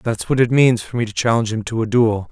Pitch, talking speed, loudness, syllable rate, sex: 115 Hz, 310 wpm, -17 LUFS, 6.4 syllables/s, male